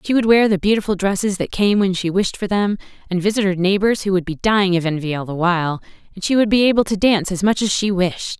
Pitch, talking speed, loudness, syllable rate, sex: 195 Hz, 270 wpm, -18 LUFS, 6.3 syllables/s, female